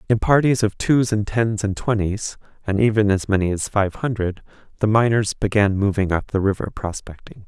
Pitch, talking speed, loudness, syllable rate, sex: 105 Hz, 185 wpm, -20 LUFS, 5.1 syllables/s, male